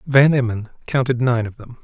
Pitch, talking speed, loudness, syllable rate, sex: 125 Hz, 195 wpm, -19 LUFS, 5.3 syllables/s, male